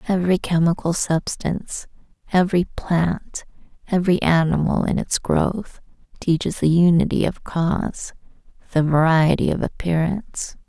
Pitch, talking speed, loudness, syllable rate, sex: 170 Hz, 105 wpm, -20 LUFS, 4.7 syllables/s, female